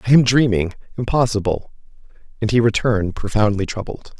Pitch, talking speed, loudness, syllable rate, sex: 110 Hz, 130 wpm, -19 LUFS, 5.8 syllables/s, male